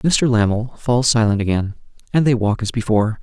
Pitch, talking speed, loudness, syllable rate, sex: 115 Hz, 185 wpm, -18 LUFS, 5.4 syllables/s, male